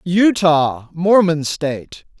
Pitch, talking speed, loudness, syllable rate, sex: 165 Hz, 80 wpm, -16 LUFS, 3.1 syllables/s, male